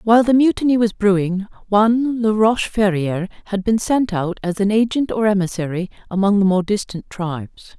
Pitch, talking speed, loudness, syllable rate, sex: 205 Hz, 175 wpm, -18 LUFS, 5.4 syllables/s, female